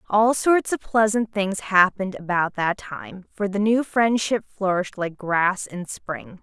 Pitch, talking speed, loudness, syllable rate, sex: 200 Hz, 170 wpm, -22 LUFS, 4.1 syllables/s, female